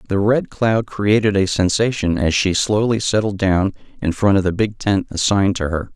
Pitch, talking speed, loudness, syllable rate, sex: 100 Hz, 200 wpm, -18 LUFS, 5.0 syllables/s, male